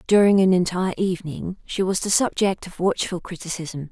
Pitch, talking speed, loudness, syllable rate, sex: 180 Hz, 170 wpm, -22 LUFS, 5.5 syllables/s, female